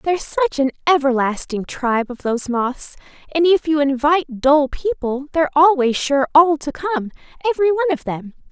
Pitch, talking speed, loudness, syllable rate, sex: 295 Hz, 170 wpm, -18 LUFS, 5.3 syllables/s, female